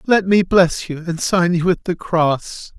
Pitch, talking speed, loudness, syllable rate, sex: 175 Hz, 215 wpm, -17 LUFS, 3.8 syllables/s, male